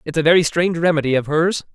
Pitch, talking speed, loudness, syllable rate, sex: 160 Hz, 240 wpm, -17 LUFS, 6.9 syllables/s, male